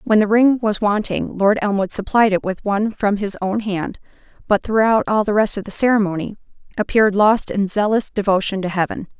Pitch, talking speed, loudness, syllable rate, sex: 205 Hz, 195 wpm, -18 LUFS, 5.5 syllables/s, female